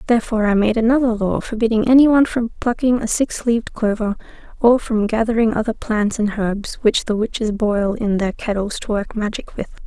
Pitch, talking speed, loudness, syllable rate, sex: 220 Hz, 190 wpm, -18 LUFS, 5.4 syllables/s, female